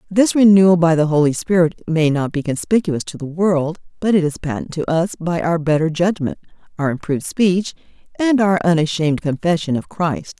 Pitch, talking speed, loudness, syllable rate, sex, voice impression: 170 Hz, 185 wpm, -17 LUFS, 5.3 syllables/s, female, very feminine, slightly middle-aged, slightly intellectual, slightly calm, elegant